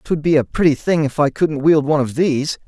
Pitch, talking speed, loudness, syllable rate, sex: 150 Hz, 270 wpm, -17 LUFS, 5.8 syllables/s, male